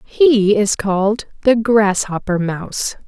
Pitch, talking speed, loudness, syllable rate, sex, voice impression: 210 Hz, 115 wpm, -16 LUFS, 3.7 syllables/s, female, feminine, adult-like, slightly bright, soft, slightly muffled, slightly intellectual, slightly calm, elegant, slightly sharp, slightly modest